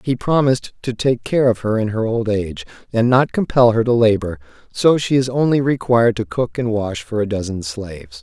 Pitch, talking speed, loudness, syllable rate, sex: 110 Hz, 220 wpm, -18 LUFS, 5.4 syllables/s, male